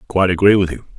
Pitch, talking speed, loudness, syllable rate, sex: 95 Hz, 305 wpm, -15 LUFS, 8.5 syllables/s, male